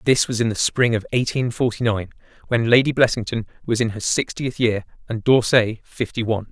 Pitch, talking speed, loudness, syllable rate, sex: 115 Hz, 195 wpm, -20 LUFS, 5.4 syllables/s, male